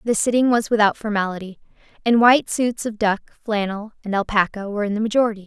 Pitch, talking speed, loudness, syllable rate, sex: 215 Hz, 185 wpm, -20 LUFS, 6.5 syllables/s, female